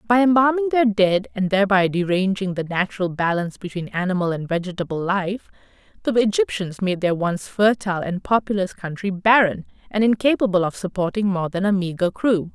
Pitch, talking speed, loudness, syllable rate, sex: 195 Hz, 165 wpm, -21 LUFS, 5.5 syllables/s, female